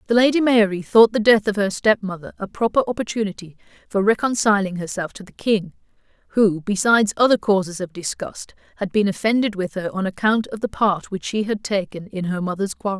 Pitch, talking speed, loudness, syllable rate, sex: 205 Hz, 200 wpm, -20 LUFS, 5.7 syllables/s, female